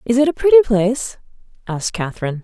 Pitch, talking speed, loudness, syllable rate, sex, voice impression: 230 Hz, 175 wpm, -16 LUFS, 7.1 syllables/s, female, feminine, adult-like, tensed, powerful, slightly hard, clear, intellectual, friendly, elegant, lively, slightly strict, slightly sharp